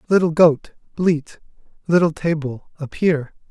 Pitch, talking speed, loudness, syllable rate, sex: 160 Hz, 105 wpm, -19 LUFS, 4.0 syllables/s, male